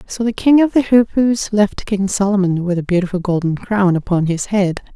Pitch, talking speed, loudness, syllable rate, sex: 200 Hz, 205 wpm, -16 LUFS, 5.1 syllables/s, female